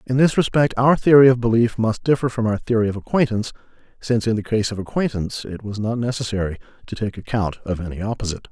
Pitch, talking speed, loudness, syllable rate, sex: 115 Hz, 210 wpm, -20 LUFS, 6.8 syllables/s, male